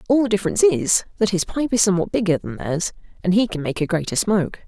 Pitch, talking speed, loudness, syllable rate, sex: 195 Hz, 245 wpm, -20 LUFS, 7.0 syllables/s, female